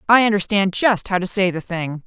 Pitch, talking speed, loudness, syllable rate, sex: 190 Hz, 235 wpm, -18 LUFS, 5.3 syllables/s, female